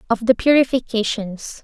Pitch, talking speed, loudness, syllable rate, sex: 235 Hz, 110 wpm, -18 LUFS, 4.9 syllables/s, female